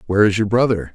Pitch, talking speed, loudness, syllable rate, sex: 105 Hz, 255 wpm, -17 LUFS, 7.6 syllables/s, male